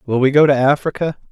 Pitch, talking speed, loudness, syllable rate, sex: 140 Hz, 230 wpm, -15 LUFS, 6.5 syllables/s, male